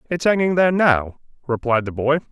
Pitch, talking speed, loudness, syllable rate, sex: 145 Hz, 180 wpm, -19 LUFS, 5.8 syllables/s, male